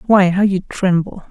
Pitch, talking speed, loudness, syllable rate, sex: 190 Hz, 185 wpm, -16 LUFS, 5.0 syllables/s, female